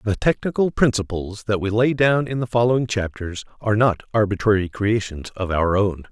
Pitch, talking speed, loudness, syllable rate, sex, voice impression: 105 Hz, 175 wpm, -21 LUFS, 5.3 syllables/s, male, masculine, adult-like, slightly thick, cool, slightly intellectual, slightly calm, slightly friendly